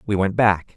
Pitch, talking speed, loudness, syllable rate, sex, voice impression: 100 Hz, 235 wpm, -19 LUFS, 4.9 syllables/s, male, very masculine, very adult-like, sincere, calm, elegant, slightly sweet